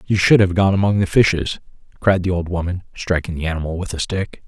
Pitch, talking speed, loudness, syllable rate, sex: 90 Hz, 230 wpm, -18 LUFS, 6.0 syllables/s, male